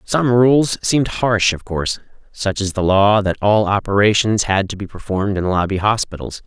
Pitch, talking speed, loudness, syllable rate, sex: 100 Hz, 185 wpm, -17 LUFS, 5.0 syllables/s, male